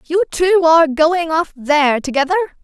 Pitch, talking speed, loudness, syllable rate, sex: 320 Hz, 160 wpm, -14 LUFS, 5.1 syllables/s, female